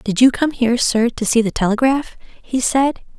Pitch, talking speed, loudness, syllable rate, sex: 240 Hz, 205 wpm, -17 LUFS, 4.8 syllables/s, female